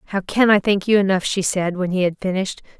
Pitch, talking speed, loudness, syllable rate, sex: 190 Hz, 260 wpm, -19 LUFS, 6.3 syllables/s, female